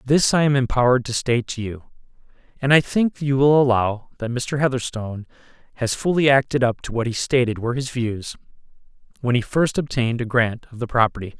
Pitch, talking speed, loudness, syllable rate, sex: 125 Hz, 195 wpm, -20 LUFS, 5.8 syllables/s, male